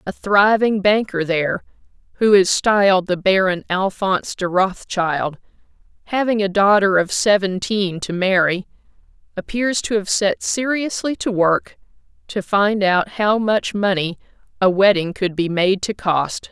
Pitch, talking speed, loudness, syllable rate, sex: 195 Hz, 140 wpm, -18 LUFS, 4.2 syllables/s, female